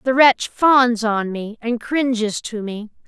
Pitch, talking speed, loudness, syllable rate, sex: 230 Hz, 175 wpm, -18 LUFS, 3.6 syllables/s, female